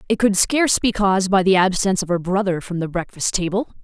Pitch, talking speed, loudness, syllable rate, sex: 190 Hz, 235 wpm, -19 LUFS, 6.2 syllables/s, female